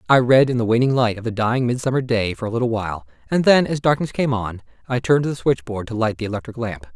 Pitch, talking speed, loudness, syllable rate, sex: 120 Hz, 275 wpm, -20 LUFS, 6.7 syllables/s, male